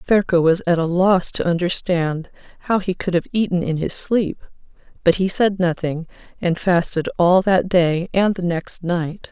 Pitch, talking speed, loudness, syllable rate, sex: 175 Hz, 180 wpm, -19 LUFS, 4.3 syllables/s, female